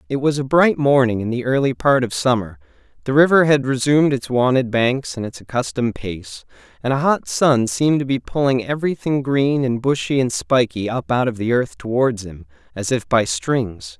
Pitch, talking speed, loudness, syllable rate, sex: 125 Hz, 200 wpm, -18 LUFS, 5.2 syllables/s, male